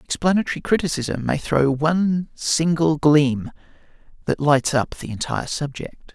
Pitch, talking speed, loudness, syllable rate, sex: 155 Hz, 125 wpm, -21 LUFS, 4.5 syllables/s, male